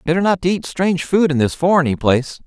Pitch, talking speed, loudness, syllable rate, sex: 165 Hz, 245 wpm, -17 LUFS, 6.4 syllables/s, male